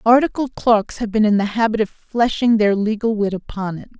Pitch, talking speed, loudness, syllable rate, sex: 215 Hz, 210 wpm, -18 LUFS, 5.2 syllables/s, female